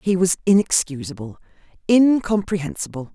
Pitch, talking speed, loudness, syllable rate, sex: 175 Hz, 75 wpm, -19 LUFS, 5.3 syllables/s, female